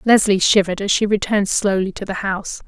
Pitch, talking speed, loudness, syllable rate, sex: 200 Hz, 200 wpm, -18 LUFS, 6.4 syllables/s, female